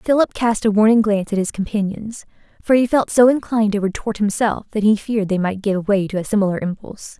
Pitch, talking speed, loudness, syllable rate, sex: 210 Hz, 225 wpm, -18 LUFS, 6.1 syllables/s, female